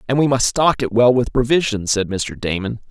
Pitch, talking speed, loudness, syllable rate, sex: 120 Hz, 225 wpm, -17 LUFS, 5.2 syllables/s, male